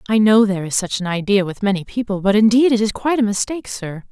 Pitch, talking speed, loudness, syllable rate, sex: 210 Hz, 260 wpm, -17 LUFS, 6.7 syllables/s, female